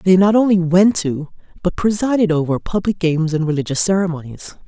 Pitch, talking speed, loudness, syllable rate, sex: 180 Hz, 165 wpm, -17 LUFS, 5.7 syllables/s, female